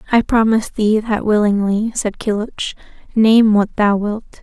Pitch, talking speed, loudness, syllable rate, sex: 215 Hz, 150 wpm, -16 LUFS, 4.6 syllables/s, female